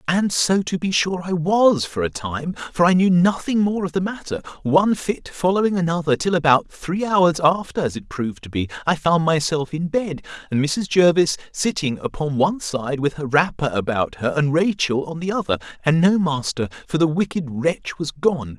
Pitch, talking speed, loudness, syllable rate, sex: 160 Hz, 205 wpm, -20 LUFS, 5.0 syllables/s, male